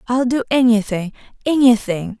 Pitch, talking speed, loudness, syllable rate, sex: 230 Hz, 80 wpm, -17 LUFS, 4.8 syllables/s, female